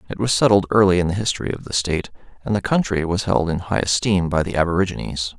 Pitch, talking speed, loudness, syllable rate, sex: 90 Hz, 235 wpm, -20 LUFS, 6.7 syllables/s, male